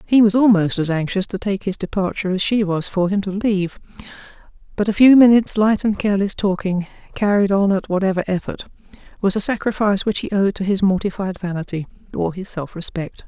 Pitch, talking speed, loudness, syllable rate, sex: 195 Hz, 195 wpm, -18 LUFS, 5.9 syllables/s, female